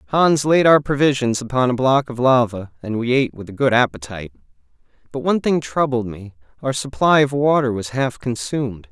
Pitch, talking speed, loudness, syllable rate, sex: 130 Hz, 190 wpm, -18 LUFS, 5.6 syllables/s, male